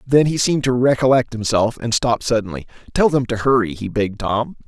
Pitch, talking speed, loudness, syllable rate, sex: 120 Hz, 205 wpm, -18 LUFS, 6.0 syllables/s, male